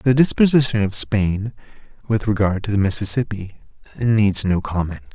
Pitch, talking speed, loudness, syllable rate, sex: 105 Hz, 140 wpm, -19 LUFS, 4.8 syllables/s, male